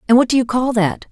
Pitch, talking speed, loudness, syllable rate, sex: 240 Hz, 325 wpm, -16 LUFS, 6.7 syllables/s, female